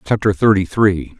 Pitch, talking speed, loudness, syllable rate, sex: 100 Hz, 150 wpm, -15 LUFS, 4.7 syllables/s, male